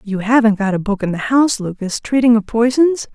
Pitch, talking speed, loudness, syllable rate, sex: 225 Hz, 230 wpm, -15 LUFS, 5.7 syllables/s, female